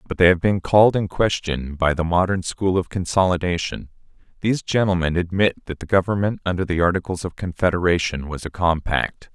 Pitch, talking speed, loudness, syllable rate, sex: 90 Hz, 175 wpm, -21 LUFS, 5.7 syllables/s, male